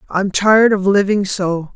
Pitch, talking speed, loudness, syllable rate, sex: 195 Hz, 135 wpm, -14 LUFS, 4.6 syllables/s, female